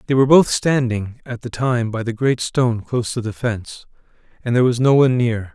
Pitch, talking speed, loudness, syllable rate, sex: 120 Hz, 225 wpm, -18 LUFS, 5.9 syllables/s, male